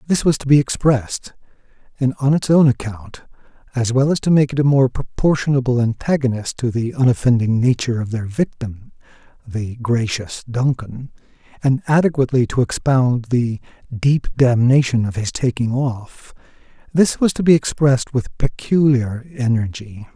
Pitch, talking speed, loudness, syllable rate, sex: 125 Hz, 145 wpm, -18 LUFS, 4.9 syllables/s, male